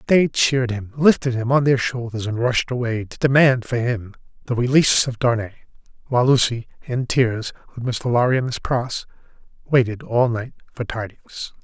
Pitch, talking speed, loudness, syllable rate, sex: 120 Hz, 175 wpm, -20 LUFS, 5.1 syllables/s, male